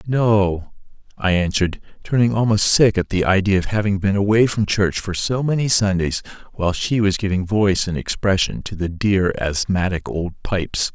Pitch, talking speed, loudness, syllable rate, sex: 100 Hz, 175 wpm, -19 LUFS, 5.0 syllables/s, male